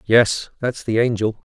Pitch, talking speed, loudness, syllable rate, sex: 115 Hz, 160 wpm, -20 LUFS, 4.0 syllables/s, male